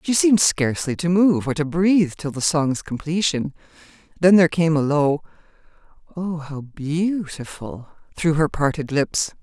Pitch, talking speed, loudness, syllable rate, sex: 160 Hz, 155 wpm, -20 LUFS, 4.6 syllables/s, female